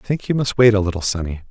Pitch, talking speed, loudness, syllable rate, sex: 105 Hz, 320 wpm, -18 LUFS, 7.4 syllables/s, male